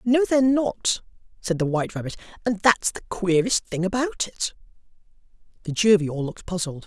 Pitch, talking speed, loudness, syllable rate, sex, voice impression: 200 Hz, 165 wpm, -23 LUFS, 4.4 syllables/s, male, masculine, slightly gender-neutral, slightly young, slightly adult-like, slightly thick, very tensed, powerful, very bright, hard, very clear, fluent, slightly cool, intellectual, very refreshing, very sincere, slightly calm, very friendly, very reassuring, unique, very wild, very lively, strict, very intense, slightly sharp, light